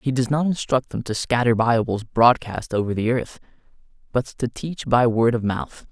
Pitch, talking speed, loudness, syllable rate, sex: 120 Hz, 195 wpm, -21 LUFS, 4.7 syllables/s, male